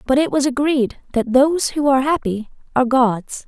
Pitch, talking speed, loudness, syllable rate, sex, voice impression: 265 Hz, 190 wpm, -18 LUFS, 5.4 syllables/s, female, gender-neutral, tensed, slightly bright, soft, fluent, intellectual, calm, friendly, elegant, slightly lively, kind, modest